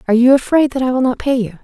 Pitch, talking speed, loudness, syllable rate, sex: 250 Hz, 330 wpm, -14 LUFS, 7.5 syllables/s, female